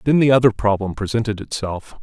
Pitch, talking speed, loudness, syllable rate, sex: 110 Hz, 180 wpm, -19 LUFS, 6.0 syllables/s, male